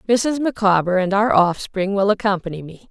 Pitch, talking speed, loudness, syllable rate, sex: 200 Hz, 165 wpm, -18 LUFS, 5.3 syllables/s, female